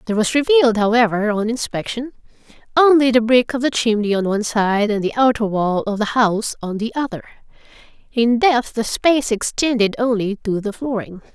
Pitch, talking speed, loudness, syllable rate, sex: 230 Hz, 180 wpm, -18 LUFS, 5.5 syllables/s, female